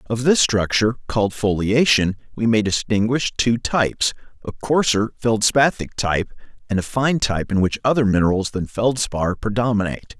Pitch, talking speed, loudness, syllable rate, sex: 110 Hz, 140 wpm, -19 LUFS, 5.3 syllables/s, male